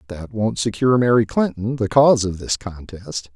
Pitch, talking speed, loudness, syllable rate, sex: 110 Hz, 180 wpm, -19 LUFS, 5.1 syllables/s, male